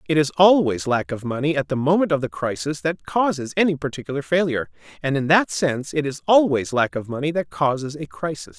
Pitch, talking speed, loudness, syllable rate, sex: 145 Hz, 215 wpm, -21 LUFS, 5.9 syllables/s, male